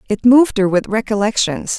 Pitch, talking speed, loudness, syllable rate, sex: 210 Hz, 170 wpm, -15 LUFS, 5.7 syllables/s, female